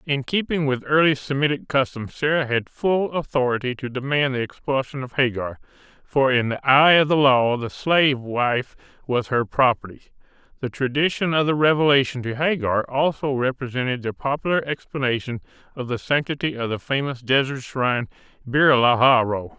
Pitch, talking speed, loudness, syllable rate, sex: 135 Hz, 160 wpm, -21 LUFS, 5.1 syllables/s, male